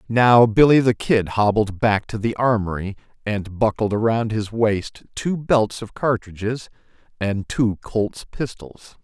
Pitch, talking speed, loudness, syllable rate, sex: 110 Hz, 145 wpm, -20 LUFS, 4.0 syllables/s, male